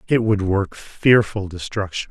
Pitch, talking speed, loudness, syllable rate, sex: 100 Hz, 145 wpm, -20 LUFS, 4.1 syllables/s, male